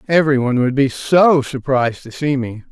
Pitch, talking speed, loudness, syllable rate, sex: 135 Hz, 200 wpm, -16 LUFS, 5.6 syllables/s, male